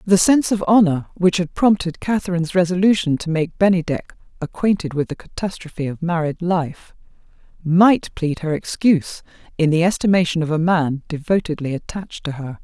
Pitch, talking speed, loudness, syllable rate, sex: 170 Hz, 155 wpm, -19 LUFS, 5.5 syllables/s, female